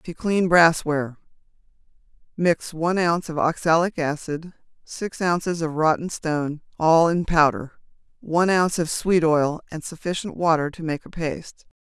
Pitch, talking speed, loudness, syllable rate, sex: 165 Hz, 140 wpm, -22 LUFS, 4.9 syllables/s, female